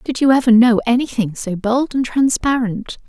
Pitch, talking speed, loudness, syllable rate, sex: 240 Hz, 175 wpm, -16 LUFS, 4.9 syllables/s, female